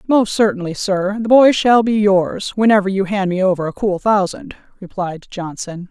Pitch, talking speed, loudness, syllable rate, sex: 195 Hz, 185 wpm, -16 LUFS, 4.8 syllables/s, female